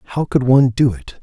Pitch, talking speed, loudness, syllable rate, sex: 130 Hz, 245 wpm, -15 LUFS, 5.0 syllables/s, male